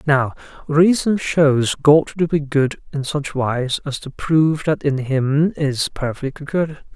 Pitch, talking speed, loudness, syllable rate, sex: 145 Hz, 165 wpm, -19 LUFS, 3.7 syllables/s, male